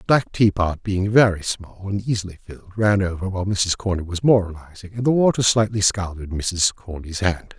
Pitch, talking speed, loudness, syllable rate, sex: 95 Hz, 190 wpm, -20 LUFS, 5.3 syllables/s, male